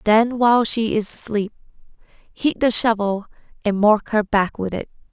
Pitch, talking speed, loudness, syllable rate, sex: 215 Hz, 165 wpm, -19 LUFS, 4.5 syllables/s, female